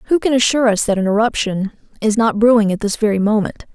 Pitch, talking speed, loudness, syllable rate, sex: 220 Hz, 225 wpm, -16 LUFS, 6.4 syllables/s, female